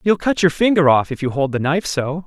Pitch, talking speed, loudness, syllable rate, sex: 160 Hz, 290 wpm, -17 LUFS, 6.0 syllables/s, male